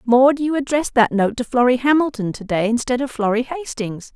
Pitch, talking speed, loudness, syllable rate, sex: 245 Hz, 190 wpm, -19 LUFS, 5.7 syllables/s, female